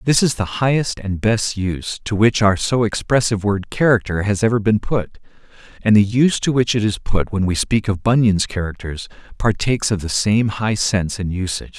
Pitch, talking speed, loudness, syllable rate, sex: 105 Hz, 205 wpm, -18 LUFS, 5.3 syllables/s, male